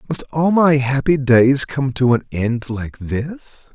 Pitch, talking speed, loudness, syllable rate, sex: 130 Hz, 175 wpm, -17 LUFS, 3.5 syllables/s, male